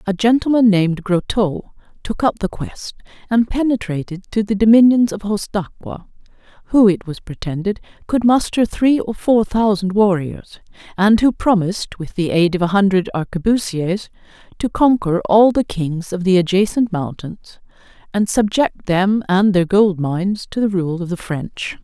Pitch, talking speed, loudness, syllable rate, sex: 200 Hz, 160 wpm, -17 LUFS, 4.7 syllables/s, female